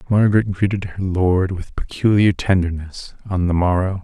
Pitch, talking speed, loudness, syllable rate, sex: 95 Hz, 150 wpm, -19 LUFS, 4.8 syllables/s, male